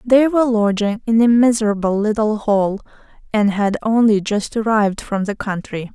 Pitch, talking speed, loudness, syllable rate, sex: 215 Hz, 160 wpm, -17 LUFS, 5.0 syllables/s, female